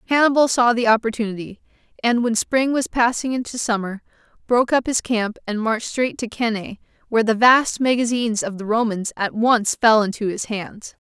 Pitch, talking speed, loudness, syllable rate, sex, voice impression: 230 Hz, 180 wpm, -19 LUFS, 5.4 syllables/s, female, feminine, adult-like, tensed, powerful, bright, clear, intellectual, calm, friendly, reassuring, elegant, lively